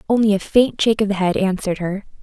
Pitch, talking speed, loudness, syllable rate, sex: 200 Hz, 245 wpm, -18 LUFS, 6.8 syllables/s, female